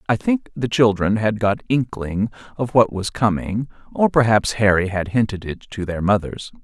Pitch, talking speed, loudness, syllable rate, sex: 110 Hz, 180 wpm, -20 LUFS, 4.7 syllables/s, male